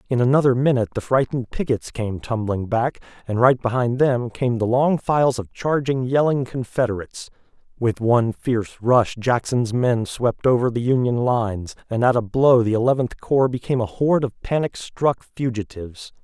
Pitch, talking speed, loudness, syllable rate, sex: 120 Hz, 165 wpm, -21 LUFS, 5.3 syllables/s, male